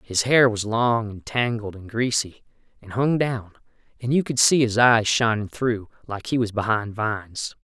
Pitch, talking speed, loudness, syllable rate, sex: 115 Hz, 190 wpm, -22 LUFS, 4.5 syllables/s, male